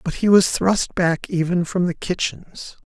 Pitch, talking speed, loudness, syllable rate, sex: 180 Hz, 190 wpm, -19 LUFS, 4.1 syllables/s, male